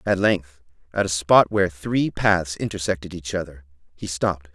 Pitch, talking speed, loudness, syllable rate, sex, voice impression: 90 Hz, 170 wpm, -22 LUFS, 5.0 syllables/s, male, masculine, adult-like, slightly cool, refreshing, sincere